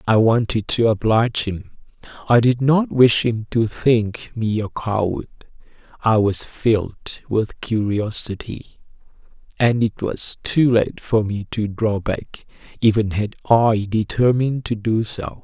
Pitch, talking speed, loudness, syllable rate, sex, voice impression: 110 Hz, 145 wpm, -19 LUFS, 4.0 syllables/s, male, masculine, slightly young, slightly adult-like, slightly thick, relaxed, weak, slightly dark, slightly hard, muffled, slightly fluent, cool, very intellectual, slightly refreshing, very sincere, very calm, mature, friendly, reassuring, slightly unique, elegant, slightly wild, slightly sweet, slightly lively, kind, modest